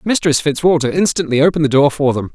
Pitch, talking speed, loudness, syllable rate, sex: 150 Hz, 205 wpm, -14 LUFS, 6.7 syllables/s, male